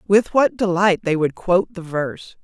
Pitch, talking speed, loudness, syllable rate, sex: 185 Hz, 195 wpm, -19 LUFS, 5.1 syllables/s, female